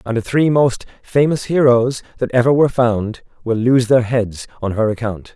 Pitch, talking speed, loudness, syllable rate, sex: 120 Hz, 190 wpm, -16 LUFS, 4.8 syllables/s, male